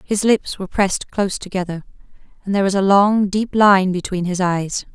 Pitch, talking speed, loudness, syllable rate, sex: 195 Hz, 195 wpm, -18 LUFS, 5.5 syllables/s, female